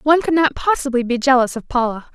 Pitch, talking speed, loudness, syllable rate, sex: 265 Hz, 225 wpm, -17 LUFS, 6.4 syllables/s, female